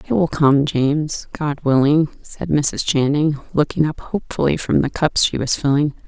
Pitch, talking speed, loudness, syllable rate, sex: 150 Hz, 180 wpm, -18 LUFS, 4.7 syllables/s, female